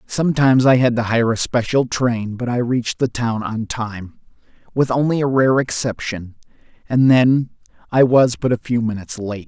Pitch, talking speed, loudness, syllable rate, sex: 120 Hz, 185 wpm, -18 LUFS, 5.0 syllables/s, male